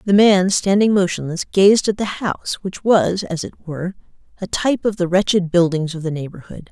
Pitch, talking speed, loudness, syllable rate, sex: 185 Hz, 195 wpm, -18 LUFS, 5.3 syllables/s, female